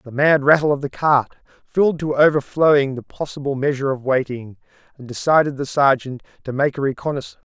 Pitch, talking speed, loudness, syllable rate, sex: 140 Hz, 175 wpm, -19 LUFS, 6.1 syllables/s, male